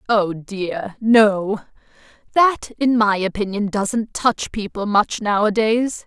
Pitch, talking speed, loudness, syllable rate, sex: 210 Hz, 120 wpm, -19 LUFS, 3.4 syllables/s, female